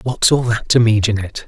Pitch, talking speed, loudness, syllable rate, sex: 115 Hz, 245 wpm, -15 LUFS, 5.8 syllables/s, male